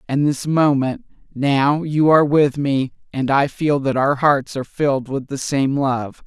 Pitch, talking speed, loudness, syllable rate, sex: 140 Hz, 190 wpm, -18 LUFS, 4.3 syllables/s, female